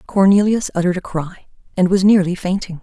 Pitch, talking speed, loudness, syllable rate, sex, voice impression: 185 Hz, 170 wpm, -16 LUFS, 5.9 syllables/s, female, feminine, adult-like, slightly muffled, calm, elegant